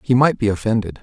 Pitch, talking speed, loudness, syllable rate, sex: 115 Hz, 235 wpm, -18 LUFS, 6.5 syllables/s, male